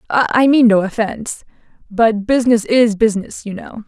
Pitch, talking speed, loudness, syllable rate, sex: 225 Hz, 155 wpm, -14 LUFS, 5.0 syllables/s, female